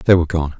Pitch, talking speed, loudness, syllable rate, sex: 80 Hz, 300 wpm, -17 LUFS, 7.6 syllables/s, male